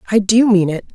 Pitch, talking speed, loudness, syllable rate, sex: 205 Hz, 255 wpm, -14 LUFS, 6.1 syllables/s, female